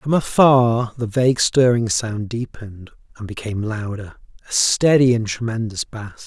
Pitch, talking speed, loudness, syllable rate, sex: 115 Hz, 145 wpm, -18 LUFS, 4.6 syllables/s, male